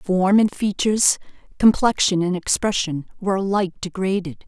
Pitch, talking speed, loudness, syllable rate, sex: 190 Hz, 120 wpm, -20 LUFS, 5.1 syllables/s, female